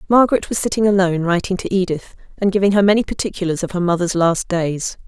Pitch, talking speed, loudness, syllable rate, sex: 185 Hz, 200 wpm, -18 LUFS, 6.5 syllables/s, female